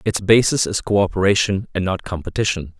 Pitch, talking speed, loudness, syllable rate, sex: 95 Hz, 150 wpm, -18 LUFS, 5.7 syllables/s, male